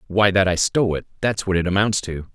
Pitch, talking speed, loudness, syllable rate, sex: 95 Hz, 255 wpm, -20 LUFS, 6.0 syllables/s, male